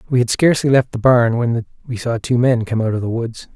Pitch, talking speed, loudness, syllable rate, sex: 120 Hz, 270 wpm, -17 LUFS, 5.8 syllables/s, male